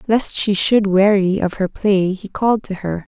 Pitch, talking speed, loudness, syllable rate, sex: 200 Hz, 210 wpm, -17 LUFS, 4.5 syllables/s, female